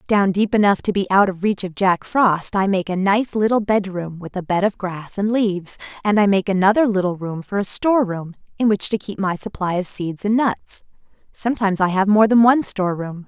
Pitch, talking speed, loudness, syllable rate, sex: 195 Hz, 225 wpm, -19 LUFS, 5.4 syllables/s, female